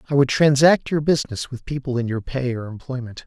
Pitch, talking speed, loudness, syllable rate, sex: 130 Hz, 220 wpm, -21 LUFS, 5.9 syllables/s, male